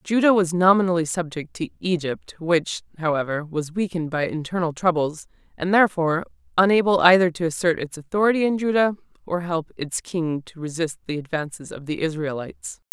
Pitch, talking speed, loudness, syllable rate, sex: 170 Hz, 160 wpm, -22 LUFS, 5.6 syllables/s, female